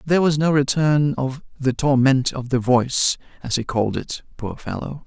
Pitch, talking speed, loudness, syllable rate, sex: 135 Hz, 180 wpm, -20 LUFS, 5.1 syllables/s, male